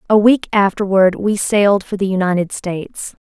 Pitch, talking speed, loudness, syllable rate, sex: 200 Hz, 165 wpm, -15 LUFS, 5.1 syllables/s, female